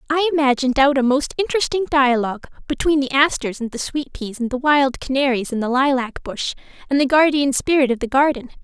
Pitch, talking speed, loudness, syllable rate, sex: 270 Hz, 200 wpm, -19 LUFS, 5.9 syllables/s, female